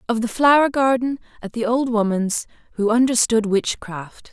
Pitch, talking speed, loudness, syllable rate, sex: 230 Hz, 155 wpm, -19 LUFS, 4.7 syllables/s, female